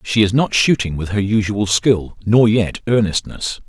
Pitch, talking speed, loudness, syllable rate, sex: 105 Hz, 180 wpm, -17 LUFS, 4.4 syllables/s, male